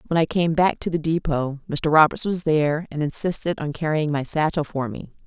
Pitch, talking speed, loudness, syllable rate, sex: 155 Hz, 215 wpm, -22 LUFS, 5.4 syllables/s, female